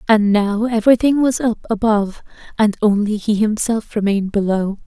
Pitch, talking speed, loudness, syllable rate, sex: 215 Hz, 150 wpm, -17 LUFS, 5.2 syllables/s, female